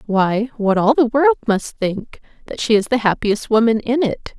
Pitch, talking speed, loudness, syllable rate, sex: 225 Hz, 190 wpm, -17 LUFS, 4.5 syllables/s, female